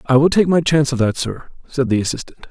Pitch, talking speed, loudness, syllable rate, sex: 140 Hz, 265 wpm, -17 LUFS, 6.3 syllables/s, male